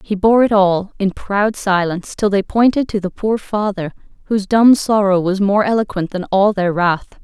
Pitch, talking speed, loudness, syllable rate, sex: 200 Hz, 200 wpm, -16 LUFS, 4.8 syllables/s, female